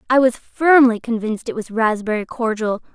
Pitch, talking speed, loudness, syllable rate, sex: 230 Hz, 165 wpm, -18 LUFS, 5.3 syllables/s, female